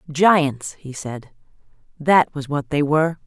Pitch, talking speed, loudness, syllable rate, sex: 150 Hz, 145 wpm, -19 LUFS, 3.8 syllables/s, female